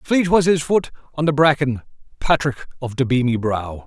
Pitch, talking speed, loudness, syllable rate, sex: 140 Hz, 185 wpm, -19 LUFS, 5.0 syllables/s, male